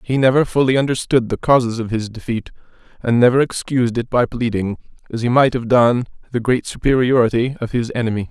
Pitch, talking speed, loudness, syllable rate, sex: 120 Hz, 190 wpm, -17 LUFS, 6.0 syllables/s, male